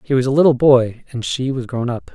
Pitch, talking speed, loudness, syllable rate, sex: 130 Hz, 280 wpm, -17 LUFS, 5.6 syllables/s, male